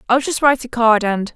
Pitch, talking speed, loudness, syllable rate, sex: 240 Hz, 265 wpm, -16 LUFS, 6.0 syllables/s, female